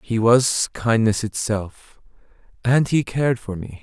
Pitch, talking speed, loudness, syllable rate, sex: 115 Hz, 140 wpm, -20 LUFS, 3.9 syllables/s, male